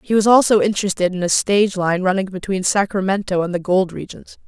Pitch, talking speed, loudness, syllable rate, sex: 190 Hz, 200 wpm, -17 LUFS, 6.0 syllables/s, female